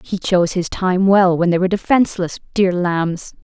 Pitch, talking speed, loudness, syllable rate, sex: 180 Hz, 190 wpm, -17 LUFS, 5.1 syllables/s, female